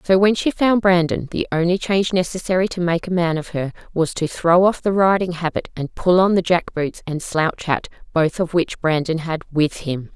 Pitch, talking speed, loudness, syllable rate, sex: 175 Hz, 225 wpm, -19 LUFS, 5.0 syllables/s, female